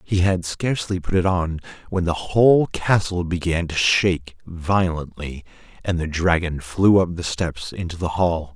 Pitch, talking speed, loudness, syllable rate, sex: 90 Hz, 170 wpm, -21 LUFS, 4.4 syllables/s, male